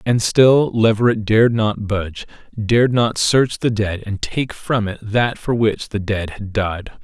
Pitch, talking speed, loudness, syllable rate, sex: 110 Hz, 190 wpm, -18 LUFS, 4.1 syllables/s, male